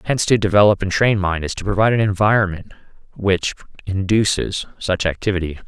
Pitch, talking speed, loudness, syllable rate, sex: 100 Hz, 160 wpm, -18 LUFS, 6.0 syllables/s, male